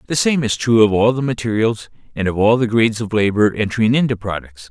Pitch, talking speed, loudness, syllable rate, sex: 110 Hz, 230 wpm, -17 LUFS, 6.1 syllables/s, male